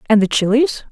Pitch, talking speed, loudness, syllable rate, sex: 225 Hz, 200 wpm, -15 LUFS, 5.9 syllables/s, female